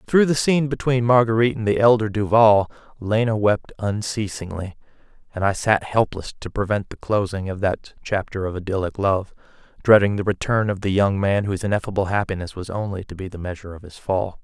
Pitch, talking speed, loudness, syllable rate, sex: 105 Hz, 185 wpm, -21 LUFS, 5.8 syllables/s, male